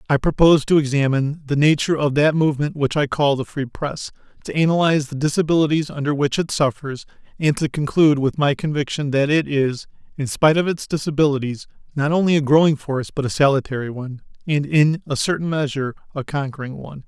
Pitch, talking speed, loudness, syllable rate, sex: 145 Hz, 190 wpm, -19 LUFS, 6.2 syllables/s, male